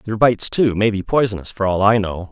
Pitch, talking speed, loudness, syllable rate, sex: 105 Hz, 260 wpm, -17 LUFS, 5.7 syllables/s, male